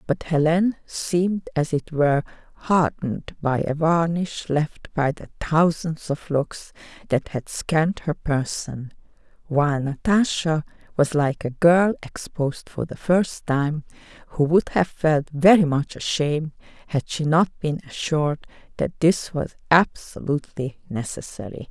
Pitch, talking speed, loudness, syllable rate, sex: 155 Hz, 135 wpm, -22 LUFS, 4.2 syllables/s, female